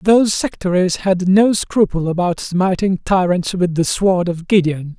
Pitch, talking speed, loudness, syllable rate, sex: 185 Hz, 155 wpm, -16 LUFS, 4.2 syllables/s, male